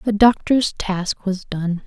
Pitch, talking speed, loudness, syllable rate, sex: 200 Hz, 160 wpm, -19 LUFS, 3.5 syllables/s, female